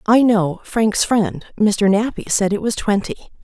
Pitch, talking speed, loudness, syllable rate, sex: 210 Hz, 175 wpm, -18 LUFS, 4.1 syllables/s, female